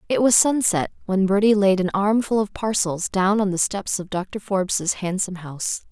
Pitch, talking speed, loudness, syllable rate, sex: 195 Hz, 195 wpm, -21 LUFS, 5.1 syllables/s, female